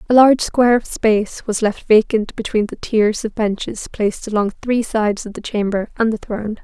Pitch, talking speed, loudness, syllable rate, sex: 220 Hz, 200 wpm, -18 LUFS, 5.2 syllables/s, female